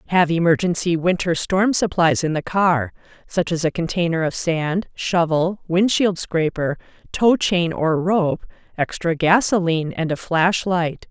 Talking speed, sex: 140 wpm, female